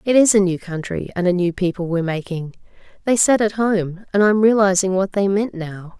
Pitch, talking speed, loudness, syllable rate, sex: 190 Hz, 220 wpm, -18 LUFS, 5.3 syllables/s, female